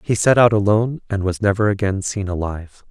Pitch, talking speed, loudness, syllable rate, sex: 100 Hz, 205 wpm, -18 LUFS, 6.0 syllables/s, male